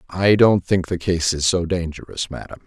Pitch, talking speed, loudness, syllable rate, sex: 90 Hz, 200 wpm, -19 LUFS, 4.9 syllables/s, male